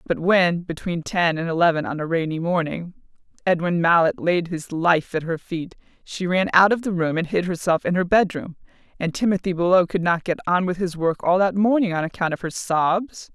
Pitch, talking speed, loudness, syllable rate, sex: 175 Hz, 215 wpm, -21 LUFS, 5.2 syllables/s, female